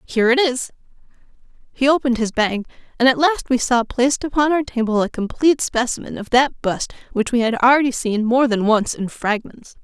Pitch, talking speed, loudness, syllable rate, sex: 245 Hz, 195 wpm, -18 LUFS, 5.5 syllables/s, female